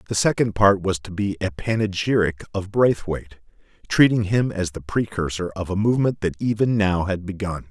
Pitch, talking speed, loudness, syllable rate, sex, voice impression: 100 Hz, 180 wpm, -22 LUFS, 5.3 syllables/s, male, masculine, adult-like, tensed, powerful, slightly hard, muffled, cool, intellectual, calm, mature, wild, lively, slightly strict